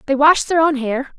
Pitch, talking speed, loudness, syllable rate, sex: 285 Hz, 255 wpm, -16 LUFS, 4.9 syllables/s, female